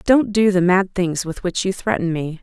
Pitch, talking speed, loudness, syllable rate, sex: 185 Hz, 250 wpm, -19 LUFS, 4.7 syllables/s, female